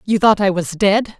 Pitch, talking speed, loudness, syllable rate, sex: 200 Hz, 250 wpm, -16 LUFS, 4.7 syllables/s, male